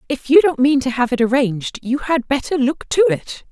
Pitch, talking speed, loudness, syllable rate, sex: 265 Hz, 240 wpm, -17 LUFS, 5.3 syllables/s, female